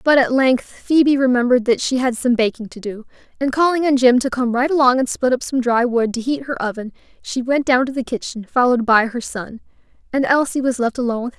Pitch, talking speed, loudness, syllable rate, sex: 250 Hz, 255 wpm, -18 LUFS, 6.2 syllables/s, female